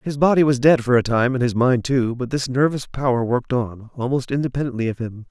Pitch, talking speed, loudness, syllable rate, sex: 125 Hz, 240 wpm, -20 LUFS, 5.9 syllables/s, male